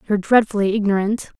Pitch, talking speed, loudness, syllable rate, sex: 205 Hz, 130 wpm, -18 LUFS, 6.8 syllables/s, female